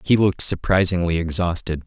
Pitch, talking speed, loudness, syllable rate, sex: 90 Hz, 130 wpm, -20 LUFS, 5.7 syllables/s, male